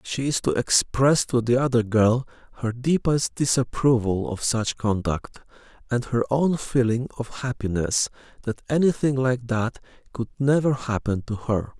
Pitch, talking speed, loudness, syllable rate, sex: 120 Hz, 145 wpm, -23 LUFS, 4.4 syllables/s, male